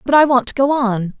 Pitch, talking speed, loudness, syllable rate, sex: 250 Hz, 300 wpm, -15 LUFS, 5.5 syllables/s, female